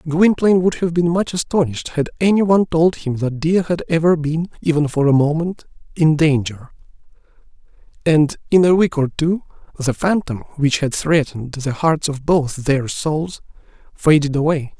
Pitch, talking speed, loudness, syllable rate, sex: 155 Hz, 165 wpm, -17 LUFS, 4.9 syllables/s, male